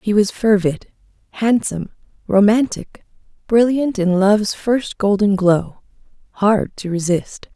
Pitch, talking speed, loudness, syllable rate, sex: 205 Hz, 110 wpm, -17 LUFS, 4.2 syllables/s, female